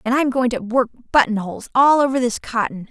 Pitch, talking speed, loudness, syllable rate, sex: 240 Hz, 205 wpm, -18 LUFS, 5.9 syllables/s, female